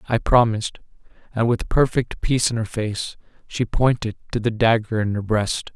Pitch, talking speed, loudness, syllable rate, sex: 115 Hz, 175 wpm, -21 LUFS, 5.0 syllables/s, male